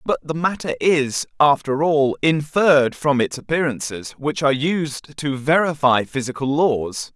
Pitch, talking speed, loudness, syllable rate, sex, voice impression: 145 Hz, 145 wpm, -19 LUFS, 4.3 syllables/s, male, masculine, adult-like, tensed, slightly powerful, bright, clear, fluent, cool, intellectual, refreshing, friendly, lively, kind